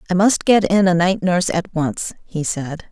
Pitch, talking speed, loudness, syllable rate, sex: 180 Hz, 225 wpm, -18 LUFS, 4.7 syllables/s, female